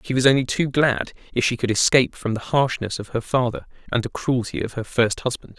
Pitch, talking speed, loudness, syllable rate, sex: 125 Hz, 235 wpm, -22 LUFS, 5.8 syllables/s, male